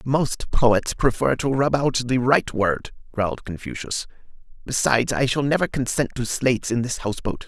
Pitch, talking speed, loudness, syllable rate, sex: 125 Hz, 175 wpm, -22 LUFS, 5.0 syllables/s, male